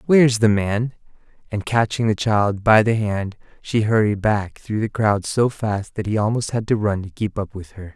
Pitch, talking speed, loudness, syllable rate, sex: 105 Hz, 225 wpm, -20 LUFS, 4.8 syllables/s, male